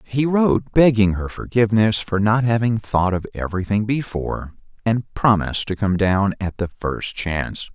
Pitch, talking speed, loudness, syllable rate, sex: 105 Hz, 165 wpm, -20 LUFS, 4.9 syllables/s, male